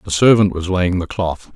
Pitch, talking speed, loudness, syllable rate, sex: 95 Hz, 230 wpm, -16 LUFS, 4.9 syllables/s, male